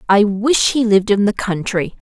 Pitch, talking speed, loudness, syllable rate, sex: 210 Hz, 200 wpm, -16 LUFS, 5.0 syllables/s, female